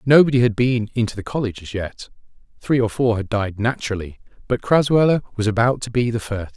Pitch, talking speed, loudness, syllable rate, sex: 115 Hz, 200 wpm, -20 LUFS, 6.0 syllables/s, male